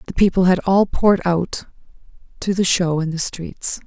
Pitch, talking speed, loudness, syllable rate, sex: 180 Hz, 185 wpm, -18 LUFS, 4.8 syllables/s, female